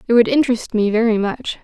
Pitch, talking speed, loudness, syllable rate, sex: 230 Hz, 220 wpm, -17 LUFS, 6.4 syllables/s, female